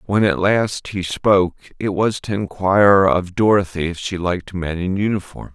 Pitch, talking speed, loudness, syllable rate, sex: 95 Hz, 185 wpm, -18 LUFS, 4.7 syllables/s, male